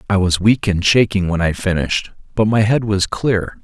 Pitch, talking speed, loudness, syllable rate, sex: 100 Hz, 215 wpm, -16 LUFS, 5.0 syllables/s, male